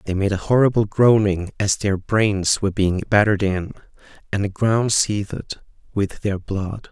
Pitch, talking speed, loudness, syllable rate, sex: 100 Hz, 165 wpm, -20 LUFS, 4.6 syllables/s, male